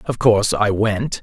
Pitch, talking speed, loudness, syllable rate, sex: 105 Hz, 195 wpm, -17 LUFS, 4.4 syllables/s, male